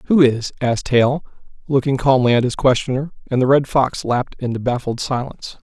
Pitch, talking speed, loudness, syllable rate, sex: 130 Hz, 180 wpm, -18 LUFS, 5.7 syllables/s, male